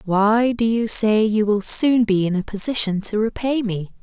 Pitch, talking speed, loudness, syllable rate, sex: 215 Hz, 210 wpm, -19 LUFS, 4.5 syllables/s, female